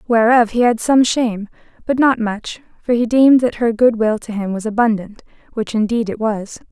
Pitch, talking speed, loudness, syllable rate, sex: 225 Hz, 195 wpm, -16 LUFS, 5.2 syllables/s, female